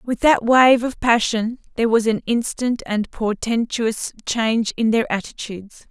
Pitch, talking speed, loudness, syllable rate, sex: 230 Hz, 155 wpm, -19 LUFS, 4.4 syllables/s, female